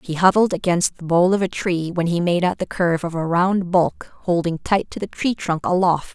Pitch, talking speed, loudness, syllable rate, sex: 175 Hz, 245 wpm, -20 LUFS, 5.0 syllables/s, female